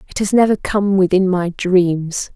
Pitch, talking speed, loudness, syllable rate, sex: 185 Hz, 180 wpm, -16 LUFS, 4.2 syllables/s, female